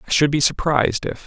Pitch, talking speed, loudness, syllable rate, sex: 140 Hz, 240 wpm, -19 LUFS, 6.3 syllables/s, male